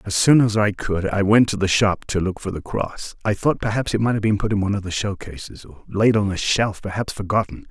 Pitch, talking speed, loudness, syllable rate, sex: 100 Hz, 275 wpm, -20 LUFS, 5.6 syllables/s, male